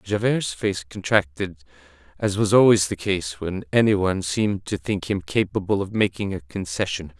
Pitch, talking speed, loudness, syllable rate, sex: 100 Hz, 165 wpm, -22 LUFS, 5.0 syllables/s, male